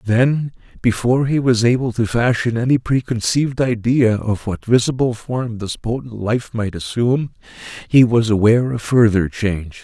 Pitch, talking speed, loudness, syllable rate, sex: 115 Hz, 150 wpm, -17 LUFS, 4.9 syllables/s, male